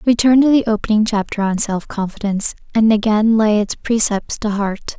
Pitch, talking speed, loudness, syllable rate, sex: 215 Hz, 180 wpm, -16 LUFS, 5.4 syllables/s, female